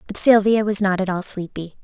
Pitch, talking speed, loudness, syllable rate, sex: 195 Hz, 230 wpm, -18 LUFS, 5.5 syllables/s, female